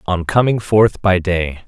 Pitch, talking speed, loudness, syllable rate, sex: 95 Hz, 180 wpm, -15 LUFS, 4.0 syllables/s, male